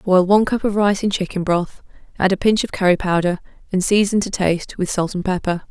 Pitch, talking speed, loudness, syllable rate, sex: 190 Hz, 230 wpm, -18 LUFS, 5.8 syllables/s, female